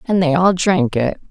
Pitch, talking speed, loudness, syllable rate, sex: 190 Hz, 230 wpm, -16 LUFS, 4.4 syllables/s, female